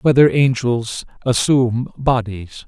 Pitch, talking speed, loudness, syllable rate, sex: 125 Hz, 90 wpm, -17 LUFS, 3.8 syllables/s, male